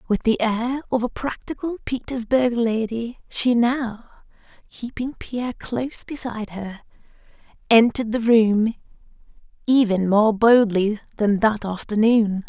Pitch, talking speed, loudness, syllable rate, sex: 230 Hz, 115 wpm, -21 LUFS, 4.3 syllables/s, female